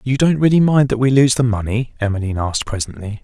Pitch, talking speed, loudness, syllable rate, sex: 120 Hz, 225 wpm, -16 LUFS, 6.5 syllables/s, male